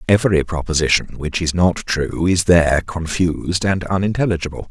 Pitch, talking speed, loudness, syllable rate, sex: 85 Hz, 140 wpm, -18 LUFS, 5.3 syllables/s, male